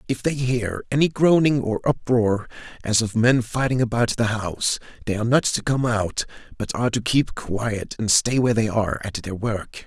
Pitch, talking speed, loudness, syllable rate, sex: 115 Hz, 200 wpm, -22 LUFS, 5.0 syllables/s, male